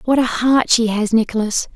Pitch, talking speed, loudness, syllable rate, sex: 230 Hz, 205 wpm, -16 LUFS, 5.0 syllables/s, female